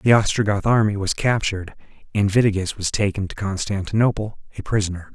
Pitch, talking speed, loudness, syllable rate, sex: 100 Hz, 150 wpm, -21 LUFS, 5.9 syllables/s, male